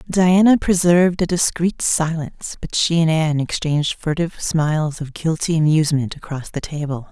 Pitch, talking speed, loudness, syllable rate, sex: 165 Hz, 150 wpm, -18 LUFS, 5.3 syllables/s, female